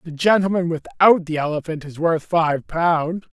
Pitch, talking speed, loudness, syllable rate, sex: 165 Hz, 160 wpm, -19 LUFS, 4.5 syllables/s, male